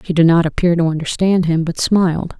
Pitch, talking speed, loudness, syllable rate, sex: 170 Hz, 225 wpm, -15 LUFS, 5.8 syllables/s, female